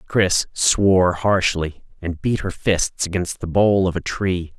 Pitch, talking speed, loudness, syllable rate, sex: 90 Hz, 170 wpm, -19 LUFS, 3.8 syllables/s, male